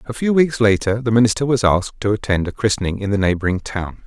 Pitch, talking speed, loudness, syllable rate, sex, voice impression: 110 Hz, 235 wpm, -18 LUFS, 6.3 syllables/s, male, masculine, adult-like, slightly thick, cool, slightly sincere, slightly wild